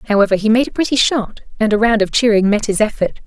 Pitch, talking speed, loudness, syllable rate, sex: 220 Hz, 260 wpm, -15 LUFS, 6.6 syllables/s, female